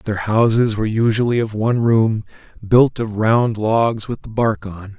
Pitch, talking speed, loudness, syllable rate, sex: 110 Hz, 180 wpm, -17 LUFS, 4.4 syllables/s, male